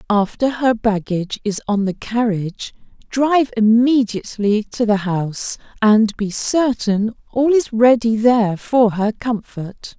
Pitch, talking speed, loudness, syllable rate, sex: 225 Hz, 130 wpm, -17 LUFS, 4.2 syllables/s, female